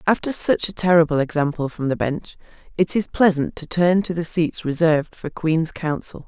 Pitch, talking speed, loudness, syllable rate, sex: 165 Hz, 190 wpm, -20 LUFS, 5.1 syllables/s, female